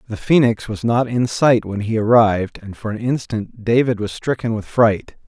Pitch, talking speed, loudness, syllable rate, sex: 115 Hz, 205 wpm, -18 LUFS, 4.8 syllables/s, male